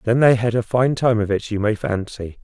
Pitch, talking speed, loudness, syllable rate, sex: 115 Hz, 270 wpm, -19 LUFS, 5.2 syllables/s, male